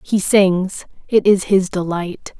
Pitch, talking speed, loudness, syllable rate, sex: 190 Hz, 150 wpm, -16 LUFS, 3.4 syllables/s, female